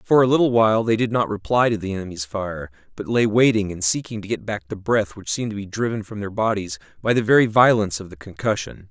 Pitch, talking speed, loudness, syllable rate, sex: 105 Hz, 250 wpm, -21 LUFS, 6.3 syllables/s, male